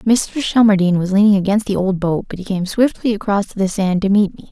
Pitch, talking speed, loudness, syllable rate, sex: 200 Hz, 240 wpm, -16 LUFS, 5.7 syllables/s, female